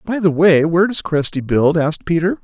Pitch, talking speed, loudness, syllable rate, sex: 170 Hz, 220 wpm, -15 LUFS, 5.7 syllables/s, male